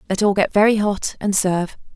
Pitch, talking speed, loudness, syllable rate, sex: 200 Hz, 215 wpm, -18 LUFS, 5.7 syllables/s, female